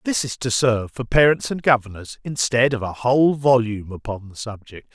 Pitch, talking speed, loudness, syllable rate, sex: 120 Hz, 195 wpm, -20 LUFS, 5.4 syllables/s, male